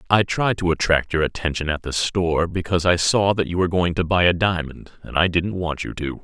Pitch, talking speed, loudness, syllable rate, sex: 85 Hz, 250 wpm, -21 LUFS, 5.7 syllables/s, male